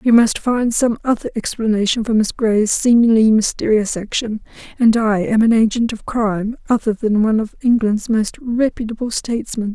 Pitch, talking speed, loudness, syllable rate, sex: 225 Hz, 160 wpm, -17 LUFS, 5.0 syllables/s, female